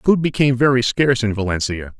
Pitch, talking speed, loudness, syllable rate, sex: 120 Hz, 180 wpm, -17 LUFS, 6.4 syllables/s, male